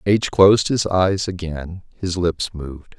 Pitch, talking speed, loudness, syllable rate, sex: 90 Hz, 160 wpm, -19 LUFS, 4.1 syllables/s, male